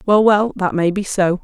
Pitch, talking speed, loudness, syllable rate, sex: 195 Hz, 250 wpm, -16 LUFS, 4.7 syllables/s, female